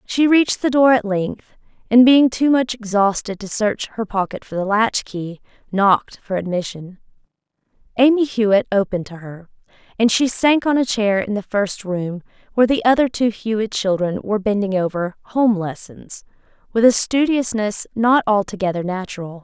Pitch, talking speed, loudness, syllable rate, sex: 215 Hz, 165 wpm, -18 LUFS, 5.0 syllables/s, female